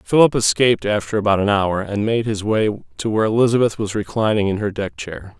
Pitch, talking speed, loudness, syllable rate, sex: 105 Hz, 210 wpm, -18 LUFS, 5.9 syllables/s, male